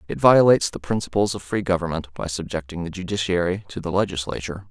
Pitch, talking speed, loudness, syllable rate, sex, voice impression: 90 Hz, 180 wpm, -22 LUFS, 6.6 syllables/s, male, masculine, adult-like, slightly thick, slightly refreshing, slightly calm, slightly friendly